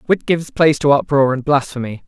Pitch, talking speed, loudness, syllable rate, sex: 140 Hz, 200 wpm, -16 LUFS, 6.3 syllables/s, male